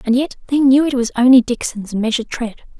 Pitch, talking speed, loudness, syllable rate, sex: 250 Hz, 215 wpm, -16 LUFS, 6.0 syllables/s, female